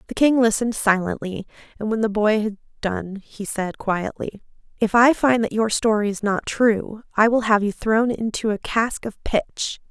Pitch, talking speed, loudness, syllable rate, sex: 215 Hz, 195 wpm, -21 LUFS, 4.8 syllables/s, female